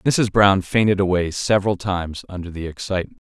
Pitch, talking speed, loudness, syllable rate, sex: 95 Hz, 165 wpm, -20 LUFS, 5.8 syllables/s, male